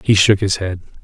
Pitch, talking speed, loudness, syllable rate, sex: 100 Hz, 230 wpm, -16 LUFS, 5.3 syllables/s, male